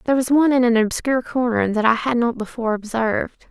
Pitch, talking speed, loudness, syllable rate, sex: 235 Hz, 225 wpm, -19 LUFS, 6.5 syllables/s, female